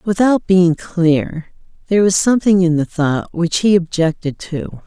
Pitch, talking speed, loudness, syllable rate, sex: 175 Hz, 160 wpm, -15 LUFS, 4.3 syllables/s, female